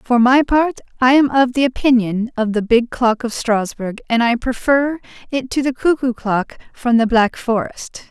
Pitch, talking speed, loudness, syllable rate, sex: 245 Hz, 195 wpm, -17 LUFS, 4.5 syllables/s, female